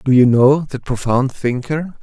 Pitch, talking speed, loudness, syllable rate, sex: 135 Hz, 180 wpm, -16 LUFS, 4.1 syllables/s, male